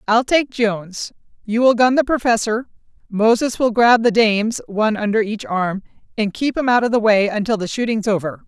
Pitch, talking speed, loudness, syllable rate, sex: 220 Hz, 200 wpm, -17 LUFS, 5.3 syllables/s, female